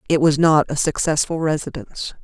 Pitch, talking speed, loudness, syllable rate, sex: 150 Hz, 160 wpm, -19 LUFS, 5.5 syllables/s, female